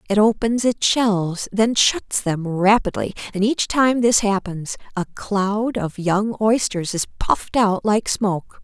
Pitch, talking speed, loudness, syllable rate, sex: 205 Hz, 160 wpm, -20 LUFS, 3.8 syllables/s, female